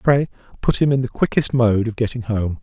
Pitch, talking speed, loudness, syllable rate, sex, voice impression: 120 Hz, 230 wpm, -19 LUFS, 5.3 syllables/s, male, masculine, adult-like, relaxed, slightly powerful, soft, muffled, raspy, slightly intellectual, calm, slightly mature, friendly, slightly wild, kind, modest